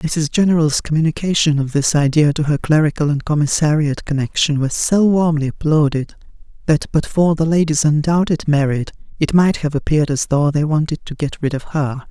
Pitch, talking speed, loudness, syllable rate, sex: 150 Hz, 180 wpm, -16 LUFS, 5.3 syllables/s, female